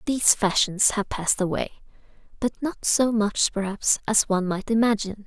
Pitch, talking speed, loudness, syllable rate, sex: 210 Hz, 160 wpm, -23 LUFS, 5.3 syllables/s, female